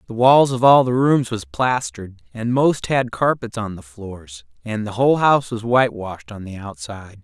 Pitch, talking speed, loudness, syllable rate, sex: 115 Hz, 200 wpm, -18 LUFS, 5.0 syllables/s, male